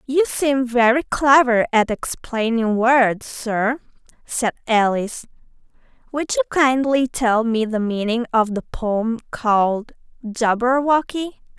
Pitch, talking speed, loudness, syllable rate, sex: 240 Hz, 115 wpm, -19 LUFS, 3.7 syllables/s, female